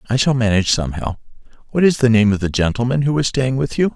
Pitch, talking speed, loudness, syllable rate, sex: 120 Hz, 230 wpm, -17 LUFS, 6.7 syllables/s, male